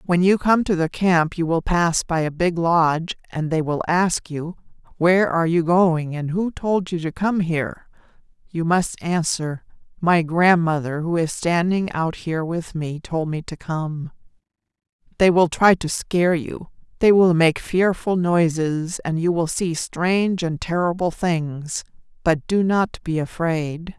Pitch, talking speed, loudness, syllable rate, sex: 170 Hz, 175 wpm, -20 LUFS, 4.1 syllables/s, female